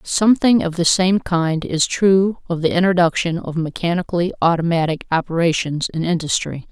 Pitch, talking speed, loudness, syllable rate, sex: 170 Hz, 145 wpm, -18 LUFS, 5.2 syllables/s, female